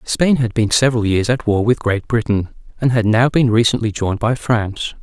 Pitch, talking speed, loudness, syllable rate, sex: 115 Hz, 215 wpm, -16 LUFS, 5.5 syllables/s, male